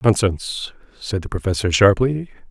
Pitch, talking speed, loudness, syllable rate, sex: 105 Hz, 120 wpm, -19 LUFS, 5.1 syllables/s, male